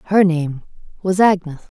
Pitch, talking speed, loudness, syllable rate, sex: 175 Hz, 135 wpm, -17 LUFS, 4.8 syllables/s, female